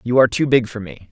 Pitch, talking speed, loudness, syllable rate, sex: 115 Hz, 320 wpm, -16 LUFS, 6.9 syllables/s, male